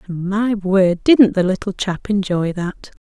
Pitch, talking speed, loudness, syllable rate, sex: 195 Hz, 180 wpm, -17 LUFS, 3.9 syllables/s, female